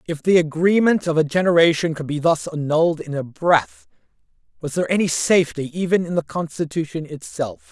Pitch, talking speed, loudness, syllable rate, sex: 160 Hz, 170 wpm, -20 LUFS, 5.6 syllables/s, male